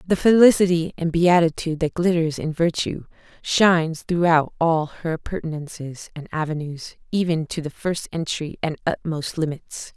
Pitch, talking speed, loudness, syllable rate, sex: 165 Hz, 140 wpm, -21 LUFS, 4.8 syllables/s, female